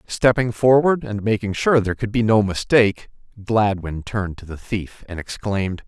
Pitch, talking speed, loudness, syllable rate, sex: 105 Hz, 175 wpm, -20 LUFS, 5.1 syllables/s, male